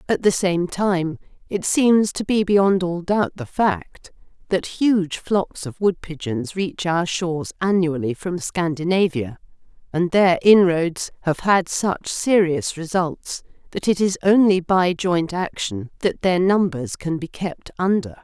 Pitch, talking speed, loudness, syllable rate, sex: 175 Hz, 150 wpm, -20 LUFS, 3.8 syllables/s, female